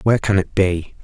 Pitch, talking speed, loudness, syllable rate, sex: 95 Hz, 230 wpm, -18 LUFS, 5.7 syllables/s, male